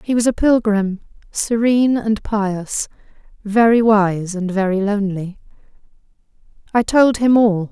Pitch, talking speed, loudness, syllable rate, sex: 210 Hz, 125 wpm, -17 LUFS, 4.2 syllables/s, female